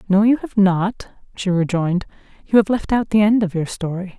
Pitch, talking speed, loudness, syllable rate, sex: 195 Hz, 215 wpm, -18 LUFS, 5.3 syllables/s, female